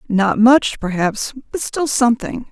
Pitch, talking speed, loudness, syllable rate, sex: 235 Hz, 145 wpm, -17 LUFS, 4.2 syllables/s, female